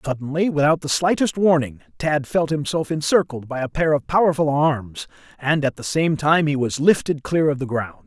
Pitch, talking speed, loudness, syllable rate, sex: 150 Hz, 200 wpm, -20 LUFS, 5.1 syllables/s, male